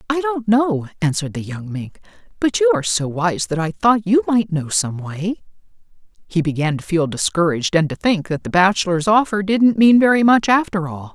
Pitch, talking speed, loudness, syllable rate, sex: 190 Hz, 205 wpm, -18 LUFS, 5.2 syllables/s, female